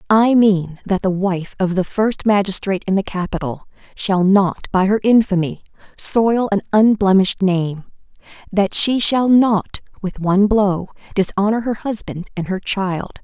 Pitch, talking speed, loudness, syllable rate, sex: 195 Hz, 155 wpm, -17 LUFS, 4.4 syllables/s, female